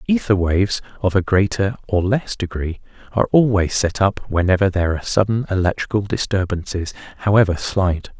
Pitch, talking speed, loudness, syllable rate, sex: 100 Hz, 145 wpm, -19 LUFS, 5.6 syllables/s, male